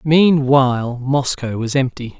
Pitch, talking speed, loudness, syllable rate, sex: 130 Hz, 110 wpm, -17 LUFS, 3.8 syllables/s, male